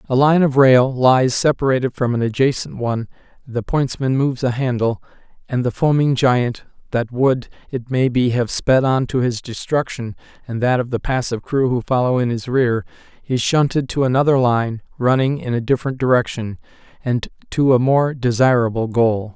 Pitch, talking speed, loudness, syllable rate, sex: 125 Hz, 175 wpm, -18 LUFS, 5.1 syllables/s, male